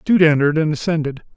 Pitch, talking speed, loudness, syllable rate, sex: 155 Hz, 175 wpm, -17 LUFS, 6.8 syllables/s, male